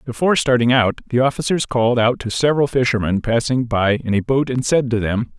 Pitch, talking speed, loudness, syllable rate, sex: 120 Hz, 210 wpm, -18 LUFS, 5.9 syllables/s, male